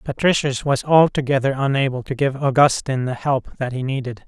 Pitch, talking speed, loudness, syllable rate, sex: 135 Hz, 170 wpm, -19 LUFS, 5.6 syllables/s, male